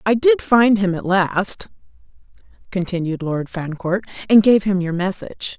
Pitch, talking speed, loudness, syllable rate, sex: 195 Hz, 150 wpm, -18 LUFS, 4.5 syllables/s, female